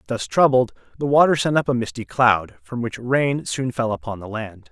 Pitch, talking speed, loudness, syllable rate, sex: 120 Hz, 215 wpm, -20 LUFS, 5.0 syllables/s, male